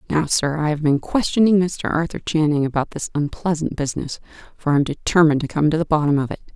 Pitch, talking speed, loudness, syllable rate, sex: 155 Hz, 220 wpm, -20 LUFS, 6.3 syllables/s, female